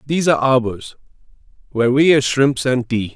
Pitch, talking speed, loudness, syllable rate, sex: 130 Hz, 170 wpm, -16 LUFS, 5.6 syllables/s, male